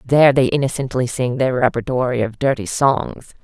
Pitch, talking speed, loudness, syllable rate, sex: 125 Hz, 155 wpm, -18 LUFS, 5.2 syllables/s, female